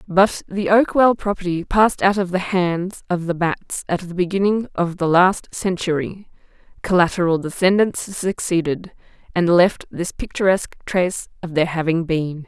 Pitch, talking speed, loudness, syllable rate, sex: 180 Hz, 150 wpm, -19 LUFS, 4.6 syllables/s, female